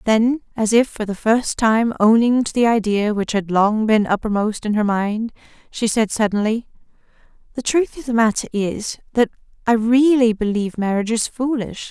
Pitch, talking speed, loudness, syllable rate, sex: 225 Hz, 175 wpm, -18 LUFS, 4.9 syllables/s, female